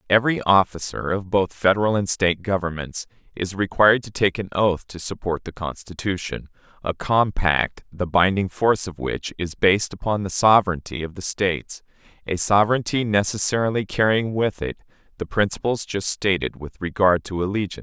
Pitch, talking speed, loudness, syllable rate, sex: 95 Hz, 155 wpm, -22 LUFS, 5.3 syllables/s, male